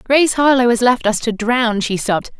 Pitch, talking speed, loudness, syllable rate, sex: 240 Hz, 225 wpm, -15 LUFS, 5.8 syllables/s, female